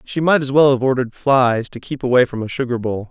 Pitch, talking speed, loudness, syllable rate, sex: 130 Hz, 270 wpm, -17 LUFS, 6.0 syllables/s, male